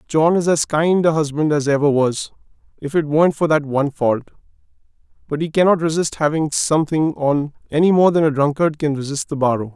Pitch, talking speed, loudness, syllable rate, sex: 150 Hz, 205 wpm, -18 LUFS, 5.7 syllables/s, male